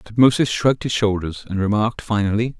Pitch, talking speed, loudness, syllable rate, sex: 110 Hz, 160 wpm, -19 LUFS, 6.2 syllables/s, male